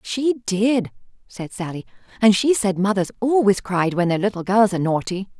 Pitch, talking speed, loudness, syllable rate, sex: 200 Hz, 180 wpm, -20 LUFS, 5.0 syllables/s, female